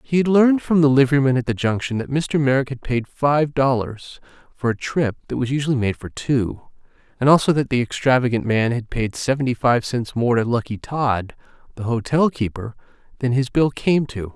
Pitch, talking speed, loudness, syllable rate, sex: 130 Hz, 200 wpm, -20 LUFS, 5.4 syllables/s, male